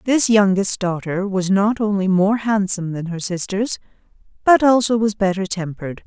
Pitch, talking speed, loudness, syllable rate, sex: 200 Hz, 160 wpm, -18 LUFS, 4.9 syllables/s, female